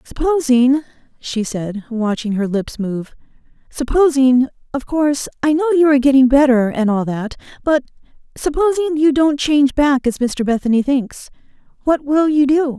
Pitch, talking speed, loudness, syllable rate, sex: 270 Hz, 145 wpm, -16 LUFS, 4.7 syllables/s, female